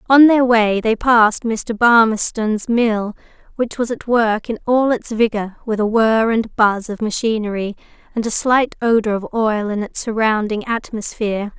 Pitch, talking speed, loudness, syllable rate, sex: 225 Hz, 170 wpm, -17 LUFS, 4.5 syllables/s, female